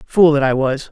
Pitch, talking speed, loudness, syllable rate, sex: 145 Hz, 265 wpm, -15 LUFS, 5.2 syllables/s, male